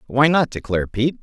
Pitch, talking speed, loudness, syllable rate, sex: 130 Hz, 195 wpm, -19 LUFS, 6.5 syllables/s, male